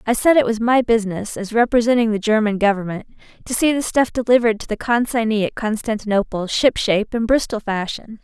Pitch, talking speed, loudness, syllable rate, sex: 220 Hz, 190 wpm, -18 LUFS, 6.0 syllables/s, female